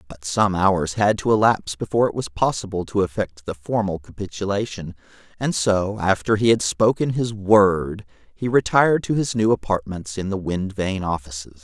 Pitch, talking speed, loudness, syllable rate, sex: 100 Hz, 175 wpm, -21 LUFS, 5.0 syllables/s, male